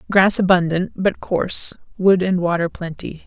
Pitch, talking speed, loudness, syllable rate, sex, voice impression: 180 Hz, 145 wpm, -18 LUFS, 4.6 syllables/s, female, feminine, adult-like, slightly bright, soft, fluent, raspy, slightly cute, intellectual, friendly, slightly elegant, kind, slightly sharp